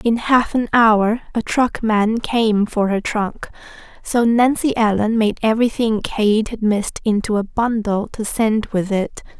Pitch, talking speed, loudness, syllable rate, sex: 220 Hz, 160 wpm, -18 LUFS, 4.1 syllables/s, female